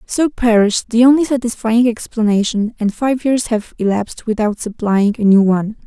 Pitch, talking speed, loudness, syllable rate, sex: 225 Hz, 165 wpm, -15 LUFS, 5.2 syllables/s, female